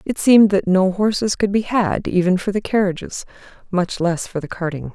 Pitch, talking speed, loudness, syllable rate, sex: 195 Hz, 205 wpm, -18 LUFS, 5.2 syllables/s, female